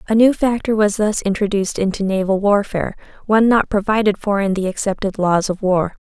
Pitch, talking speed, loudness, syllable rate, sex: 205 Hz, 190 wpm, -17 LUFS, 5.8 syllables/s, female